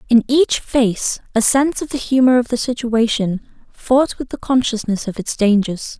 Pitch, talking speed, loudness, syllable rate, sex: 240 Hz, 180 wpm, -17 LUFS, 4.6 syllables/s, female